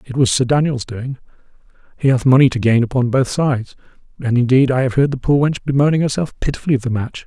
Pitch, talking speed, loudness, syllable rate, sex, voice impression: 130 Hz, 225 wpm, -16 LUFS, 6.5 syllables/s, male, very masculine, very adult-like, very middle-aged, thick, relaxed, weak, dark, soft, slightly muffled, slightly fluent, slightly cool, intellectual, slightly refreshing, sincere, very calm, slightly mature, friendly, reassuring, slightly unique, elegant, sweet, very kind, modest